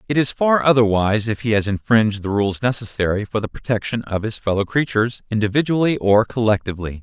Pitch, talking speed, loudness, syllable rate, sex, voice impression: 110 Hz, 180 wpm, -19 LUFS, 6.2 syllables/s, male, masculine, adult-like, slightly middle-aged, tensed, slightly powerful, bright, hard, clear, fluent, cool, intellectual, slightly refreshing, sincere, calm, slightly mature, slightly friendly, reassuring, elegant, slightly wild, kind